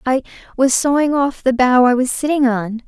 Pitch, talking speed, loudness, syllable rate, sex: 260 Hz, 210 wpm, -16 LUFS, 5.1 syllables/s, female